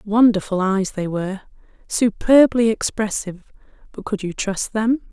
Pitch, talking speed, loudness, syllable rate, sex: 210 Hz, 130 wpm, -19 LUFS, 4.7 syllables/s, female